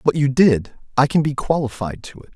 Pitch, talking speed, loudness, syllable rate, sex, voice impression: 135 Hz, 230 wpm, -19 LUFS, 5.4 syllables/s, male, very masculine, very middle-aged, very thick, tensed, very powerful, slightly bright, slightly soft, muffled, fluent, slightly raspy, very cool, intellectual, refreshing, sincere, very calm, friendly, very reassuring, unique, elegant, wild, very sweet, lively, kind, slightly modest